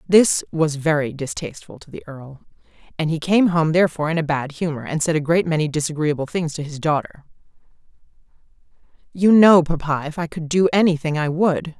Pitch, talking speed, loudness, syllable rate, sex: 160 Hz, 185 wpm, -19 LUFS, 5.8 syllables/s, female